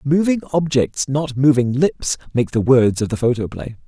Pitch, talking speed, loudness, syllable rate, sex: 135 Hz, 170 wpm, -18 LUFS, 4.7 syllables/s, male